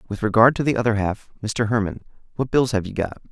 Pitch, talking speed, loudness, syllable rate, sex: 115 Hz, 235 wpm, -21 LUFS, 6.3 syllables/s, male